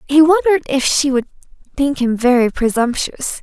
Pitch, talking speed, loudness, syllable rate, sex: 270 Hz, 160 wpm, -15 LUFS, 5.2 syllables/s, female